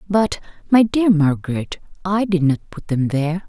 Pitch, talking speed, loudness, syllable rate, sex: 175 Hz, 170 wpm, -19 LUFS, 4.9 syllables/s, female